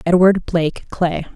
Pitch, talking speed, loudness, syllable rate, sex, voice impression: 175 Hz, 135 wpm, -17 LUFS, 4.6 syllables/s, female, feminine, adult-like, tensed, powerful, clear, fluent, intellectual, calm, elegant, strict, sharp